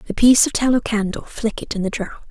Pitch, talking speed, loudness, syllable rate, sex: 220 Hz, 235 wpm, -19 LUFS, 6.7 syllables/s, female